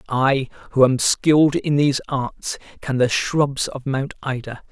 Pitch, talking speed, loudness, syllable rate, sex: 135 Hz, 165 wpm, -20 LUFS, 4.1 syllables/s, male